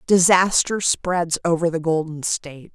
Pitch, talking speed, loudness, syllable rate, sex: 170 Hz, 130 wpm, -19 LUFS, 4.3 syllables/s, female